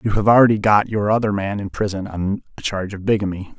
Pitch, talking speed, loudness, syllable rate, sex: 100 Hz, 235 wpm, -19 LUFS, 6.3 syllables/s, male